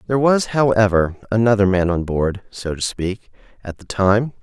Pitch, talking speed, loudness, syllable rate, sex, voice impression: 105 Hz, 175 wpm, -18 LUFS, 4.9 syllables/s, male, masculine, slightly young, slightly adult-like, slightly thick, slightly tensed, slightly powerful, bright, slightly hard, clear, fluent, very cool, intellectual, very refreshing, very sincere, very calm, very mature, friendly, very reassuring, slightly unique, slightly elegant, very wild, slightly sweet, slightly lively, very kind